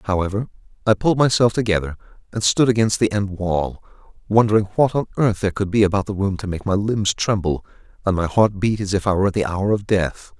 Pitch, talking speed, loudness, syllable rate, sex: 100 Hz, 225 wpm, -20 LUFS, 6.1 syllables/s, male